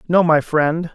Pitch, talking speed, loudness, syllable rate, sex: 160 Hz, 190 wpm, -17 LUFS, 3.8 syllables/s, male